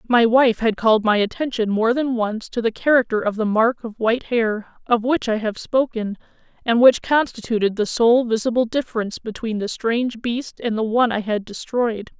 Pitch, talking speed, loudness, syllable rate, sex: 230 Hz, 195 wpm, -20 LUFS, 5.2 syllables/s, female